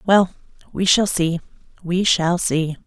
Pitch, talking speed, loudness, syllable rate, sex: 175 Hz, 145 wpm, -19 LUFS, 3.9 syllables/s, female